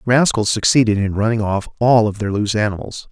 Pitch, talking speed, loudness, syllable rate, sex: 110 Hz, 210 wpm, -17 LUFS, 6.3 syllables/s, male